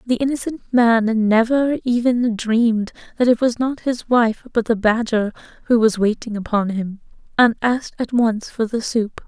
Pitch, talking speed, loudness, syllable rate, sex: 230 Hz, 175 wpm, -19 LUFS, 4.5 syllables/s, female